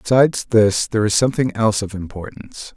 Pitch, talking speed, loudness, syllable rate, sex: 110 Hz, 195 wpm, -17 LUFS, 7.1 syllables/s, male